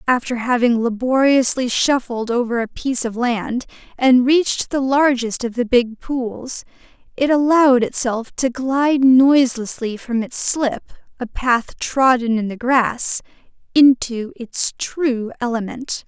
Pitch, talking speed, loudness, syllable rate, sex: 250 Hz, 125 wpm, -18 LUFS, 4.0 syllables/s, female